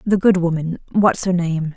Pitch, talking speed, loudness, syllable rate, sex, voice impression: 175 Hz, 170 wpm, -18 LUFS, 4.6 syllables/s, female, feminine, adult-like, relaxed, slightly weak, clear, slightly raspy, intellectual, calm, elegant, slightly sharp, modest